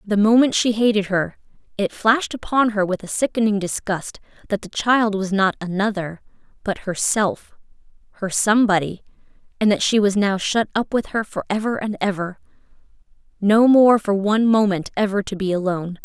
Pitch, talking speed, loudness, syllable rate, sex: 205 Hz, 170 wpm, -19 LUFS, 5.2 syllables/s, female